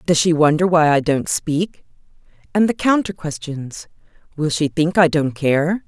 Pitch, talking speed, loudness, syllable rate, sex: 160 Hz, 165 wpm, -18 LUFS, 4.4 syllables/s, female